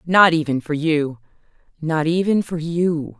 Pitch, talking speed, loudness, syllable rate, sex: 160 Hz, 130 wpm, -19 LUFS, 4.1 syllables/s, female